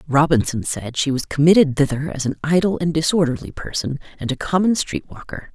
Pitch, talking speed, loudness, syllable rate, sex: 150 Hz, 185 wpm, -19 LUFS, 5.6 syllables/s, female